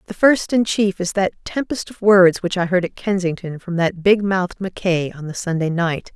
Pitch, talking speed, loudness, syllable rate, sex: 185 Hz, 205 wpm, -19 LUFS, 5.0 syllables/s, female